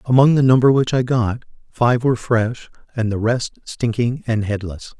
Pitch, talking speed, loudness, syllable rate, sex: 120 Hz, 180 wpm, -18 LUFS, 4.8 syllables/s, male